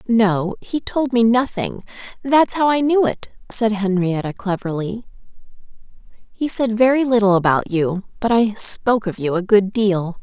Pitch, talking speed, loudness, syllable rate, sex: 215 Hz, 160 wpm, -18 LUFS, 4.4 syllables/s, female